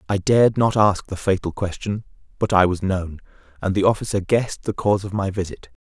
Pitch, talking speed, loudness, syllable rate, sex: 95 Hz, 205 wpm, -21 LUFS, 5.8 syllables/s, male